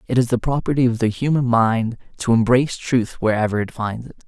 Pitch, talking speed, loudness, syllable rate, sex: 120 Hz, 210 wpm, -19 LUFS, 5.7 syllables/s, male